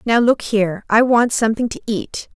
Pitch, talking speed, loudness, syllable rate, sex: 225 Hz, 200 wpm, -17 LUFS, 5.2 syllables/s, female